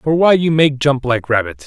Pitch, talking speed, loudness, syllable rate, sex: 140 Hz, 250 wpm, -14 LUFS, 4.9 syllables/s, male